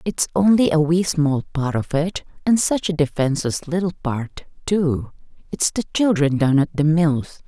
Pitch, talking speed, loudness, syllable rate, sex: 160 Hz, 170 wpm, -20 LUFS, 4.5 syllables/s, female